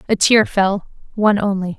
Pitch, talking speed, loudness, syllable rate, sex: 200 Hz, 170 wpm, -16 LUFS, 5.3 syllables/s, female